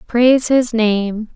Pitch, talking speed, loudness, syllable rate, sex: 230 Hz, 135 wpm, -15 LUFS, 3.5 syllables/s, female